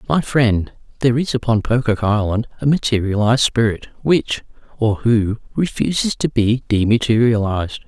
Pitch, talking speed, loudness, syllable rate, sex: 115 Hz, 130 wpm, -18 LUFS, 5.2 syllables/s, male